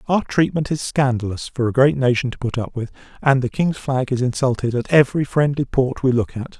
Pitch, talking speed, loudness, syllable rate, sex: 130 Hz, 225 wpm, -19 LUFS, 5.6 syllables/s, male